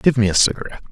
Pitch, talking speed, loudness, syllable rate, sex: 110 Hz, 260 wpm, -16 LUFS, 8.6 syllables/s, male